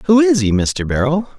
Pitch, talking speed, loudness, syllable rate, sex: 155 Hz, 215 wpm, -15 LUFS, 5.1 syllables/s, male